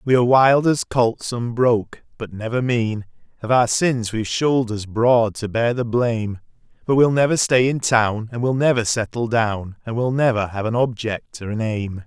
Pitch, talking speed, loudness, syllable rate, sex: 115 Hz, 195 wpm, -19 LUFS, 4.7 syllables/s, male